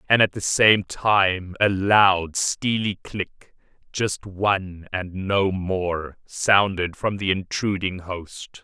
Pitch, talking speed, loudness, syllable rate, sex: 95 Hz, 130 wpm, -22 LUFS, 3.0 syllables/s, male